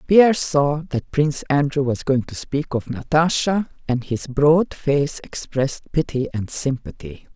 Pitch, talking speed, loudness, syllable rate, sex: 145 Hz, 155 wpm, -21 LUFS, 4.4 syllables/s, female